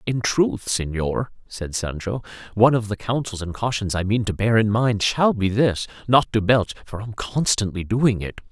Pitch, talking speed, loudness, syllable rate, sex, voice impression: 110 Hz, 195 wpm, -22 LUFS, 4.7 syllables/s, male, masculine, adult-like, thick, tensed, powerful, clear, fluent, cool, intellectual, calm, friendly, wild, lively, slightly strict